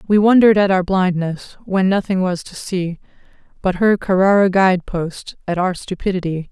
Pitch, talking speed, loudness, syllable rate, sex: 185 Hz, 165 wpm, -17 LUFS, 5.0 syllables/s, female